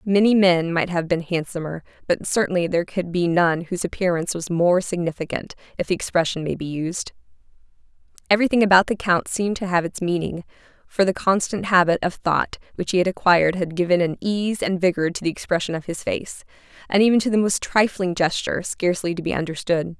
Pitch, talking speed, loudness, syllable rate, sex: 180 Hz, 195 wpm, -21 LUFS, 6.0 syllables/s, female